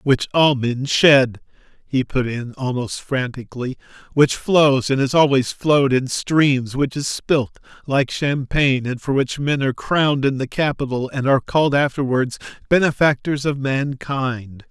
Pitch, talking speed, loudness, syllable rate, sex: 135 Hz, 155 wpm, -19 LUFS, 4.5 syllables/s, male